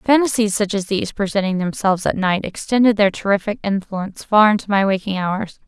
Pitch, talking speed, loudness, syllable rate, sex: 200 Hz, 180 wpm, -18 LUFS, 5.8 syllables/s, female